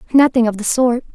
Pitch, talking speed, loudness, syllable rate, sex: 240 Hz, 210 wpm, -15 LUFS, 6.3 syllables/s, female